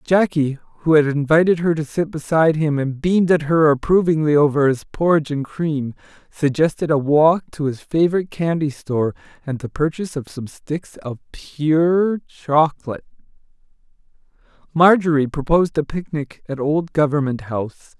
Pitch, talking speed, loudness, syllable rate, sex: 155 Hz, 145 wpm, -19 LUFS, 5.1 syllables/s, male